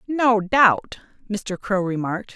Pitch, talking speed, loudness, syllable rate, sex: 210 Hz, 130 wpm, -21 LUFS, 3.9 syllables/s, female